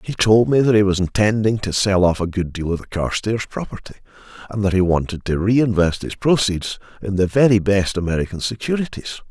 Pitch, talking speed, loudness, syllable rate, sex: 100 Hz, 200 wpm, -19 LUFS, 5.7 syllables/s, male